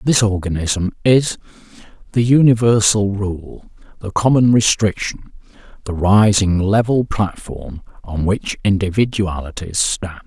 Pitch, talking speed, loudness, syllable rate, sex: 100 Hz, 100 wpm, -16 LUFS, 4.0 syllables/s, male